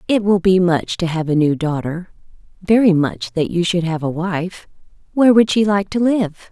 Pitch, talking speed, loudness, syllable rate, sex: 180 Hz, 205 wpm, -17 LUFS, 4.9 syllables/s, female